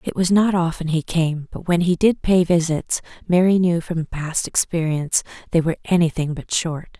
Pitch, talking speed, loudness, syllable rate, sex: 170 Hz, 195 wpm, -20 LUFS, 5.0 syllables/s, female